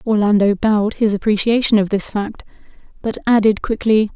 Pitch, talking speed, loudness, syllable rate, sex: 215 Hz, 145 wpm, -16 LUFS, 5.3 syllables/s, female